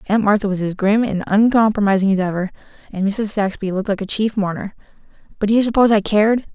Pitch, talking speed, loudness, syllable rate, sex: 205 Hz, 210 wpm, -18 LUFS, 6.6 syllables/s, female